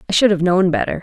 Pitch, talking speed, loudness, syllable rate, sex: 185 Hz, 295 wpm, -16 LUFS, 7.2 syllables/s, female